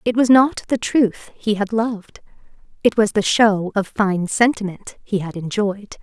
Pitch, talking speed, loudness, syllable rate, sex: 210 Hz, 180 wpm, -19 LUFS, 4.3 syllables/s, female